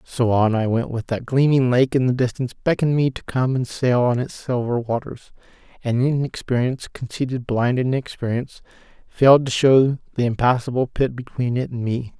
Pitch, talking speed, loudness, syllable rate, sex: 125 Hz, 175 wpm, -20 LUFS, 5.3 syllables/s, male